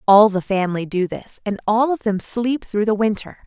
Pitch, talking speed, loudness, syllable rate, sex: 210 Hz, 225 wpm, -20 LUFS, 5.0 syllables/s, female